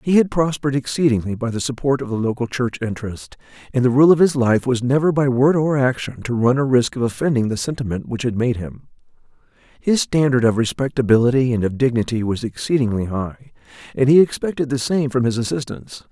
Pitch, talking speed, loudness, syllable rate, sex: 130 Hz, 200 wpm, -19 LUFS, 6.0 syllables/s, male